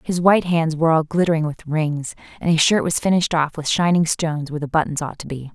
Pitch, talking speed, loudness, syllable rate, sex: 160 Hz, 250 wpm, -19 LUFS, 6.4 syllables/s, female